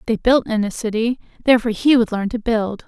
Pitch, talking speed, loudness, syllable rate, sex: 225 Hz, 230 wpm, -18 LUFS, 6.1 syllables/s, female